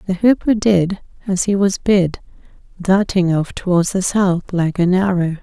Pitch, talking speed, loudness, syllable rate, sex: 185 Hz, 165 wpm, -17 LUFS, 4.3 syllables/s, female